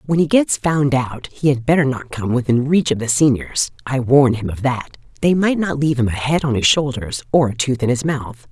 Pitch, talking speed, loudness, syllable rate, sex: 135 Hz, 255 wpm, -17 LUFS, 5.2 syllables/s, female